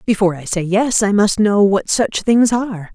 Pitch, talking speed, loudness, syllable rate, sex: 205 Hz, 225 wpm, -15 LUFS, 5.1 syllables/s, female